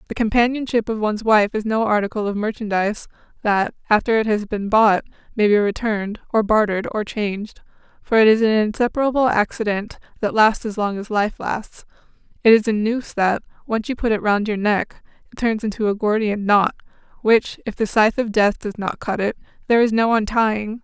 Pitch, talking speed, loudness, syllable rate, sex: 215 Hz, 195 wpm, -19 LUFS, 5.5 syllables/s, female